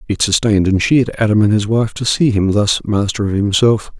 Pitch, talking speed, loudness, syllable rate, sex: 105 Hz, 225 wpm, -14 LUFS, 5.7 syllables/s, male